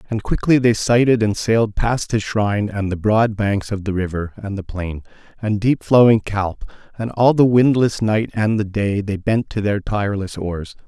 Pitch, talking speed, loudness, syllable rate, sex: 105 Hz, 205 wpm, -18 LUFS, 4.8 syllables/s, male